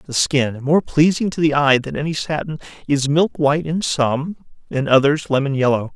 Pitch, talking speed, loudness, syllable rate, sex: 145 Hz, 190 wpm, -18 LUFS, 4.8 syllables/s, male